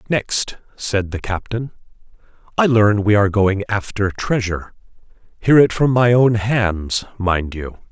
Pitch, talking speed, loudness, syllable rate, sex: 105 Hz, 135 wpm, -18 LUFS, 4.1 syllables/s, male